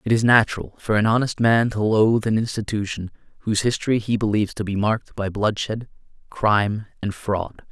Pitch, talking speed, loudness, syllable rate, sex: 110 Hz, 180 wpm, -21 LUFS, 5.7 syllables/s, male